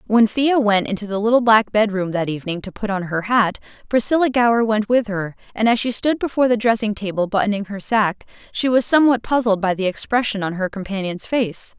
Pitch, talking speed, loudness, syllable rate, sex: 215 Hz, 215 wpm, -19 LUFS, 5.9 syllables/s, female